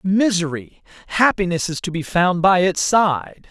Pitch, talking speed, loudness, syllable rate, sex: 180 Hz, 135 wpm, -18 LUFS, 4.2 syllables/s, male